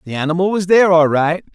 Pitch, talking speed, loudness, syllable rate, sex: 170 Hz, 235 wpm, -14 LUFS, 6.7 syllables/s, male